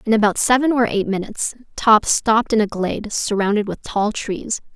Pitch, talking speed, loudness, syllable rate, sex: 215 Hz, 190 wpm, -19 LUFS, 5.3 syllables/s, female